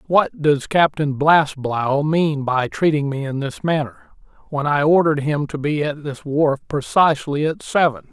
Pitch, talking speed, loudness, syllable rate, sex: 145 Hz, 170 wpm, -19 LUFS, 4.5 syllables/s, male